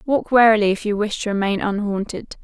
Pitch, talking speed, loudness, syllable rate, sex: 210 Hz, 195 wpm, -19 LUFS, 5.7 syllables/s, female